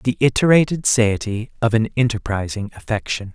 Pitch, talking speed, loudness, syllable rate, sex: 115 Hz, 125 wpm, -19 LUFS, 5.6 syllables/s, male